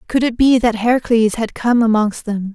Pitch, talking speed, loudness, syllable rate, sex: 225 Hz, 210 wpm, -16 LUFS, 5.0 syllables/s, female